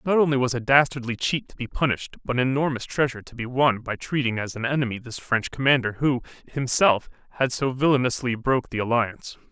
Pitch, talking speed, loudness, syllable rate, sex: 125 Hz, 200 wpm, -23 LUFS, 6.2 syllables/s, male